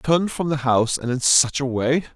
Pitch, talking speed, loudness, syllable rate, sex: 140 Hz, 250 wpm, -20 LUFS, 5.4 syllables/s, male